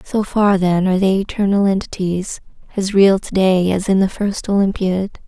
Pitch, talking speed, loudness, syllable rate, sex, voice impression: 195 Hz, 180 wpm, -16 LUFS, 4.8 syllables/s, female, feminine, very adult-like, dark, very calm, slightly unique